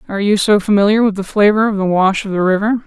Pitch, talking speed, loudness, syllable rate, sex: 200 Hz, 270 wpm, -14 LUFS, 6.7 syllables/s, female